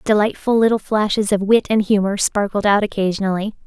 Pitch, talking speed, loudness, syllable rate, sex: 205 Hz, 165 wpm, -17 LUFS, 5.8 syllables/s, female